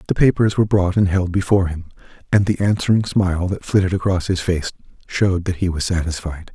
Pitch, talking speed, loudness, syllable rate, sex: 95 Hz, 200 wpm, -19 LUFS, 6.1 syllables/s, male